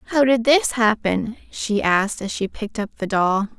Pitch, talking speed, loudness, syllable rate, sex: 220 Hz, 200 wpm, -20 LUFS, 4.8 syllables/s, female